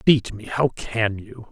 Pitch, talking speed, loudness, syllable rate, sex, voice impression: 115 Hz, 200 wpm, -23 LUFS, 3.6 syllables/s, male, masculine, middle-aged, slightly thick, tensed, slightly powerful, hard, slightly raspy, cool, calm, mature, wild, strict